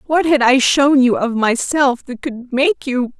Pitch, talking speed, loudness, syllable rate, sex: 260 Hz, 205 wpm, -15 LUFS, 4.0 syllables/s, female